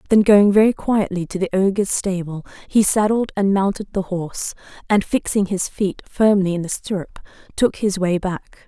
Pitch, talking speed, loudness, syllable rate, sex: 195 Hz, 180 wpm, -19 LUFS, 4.8 syllables/s, female